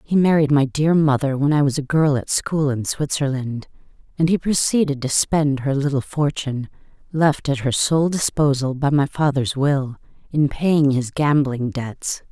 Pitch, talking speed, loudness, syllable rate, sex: 140 Hz, 175 wpm, -19 LUFS, 4.5 syllables/s, female